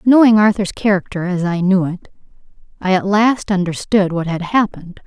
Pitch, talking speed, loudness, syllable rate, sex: 195 Hz, 165 wpm, -16 LUFS, 5.1 syllables/s, female